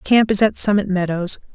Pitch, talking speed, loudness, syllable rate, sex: 195 Hz, 195 wpm, -17 LUFS, 5.3 syllables/s, female